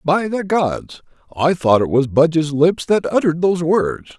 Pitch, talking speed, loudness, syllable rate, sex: 160 Hz, 185 wpm, -17 LUFS, 4.6 syllables/s, male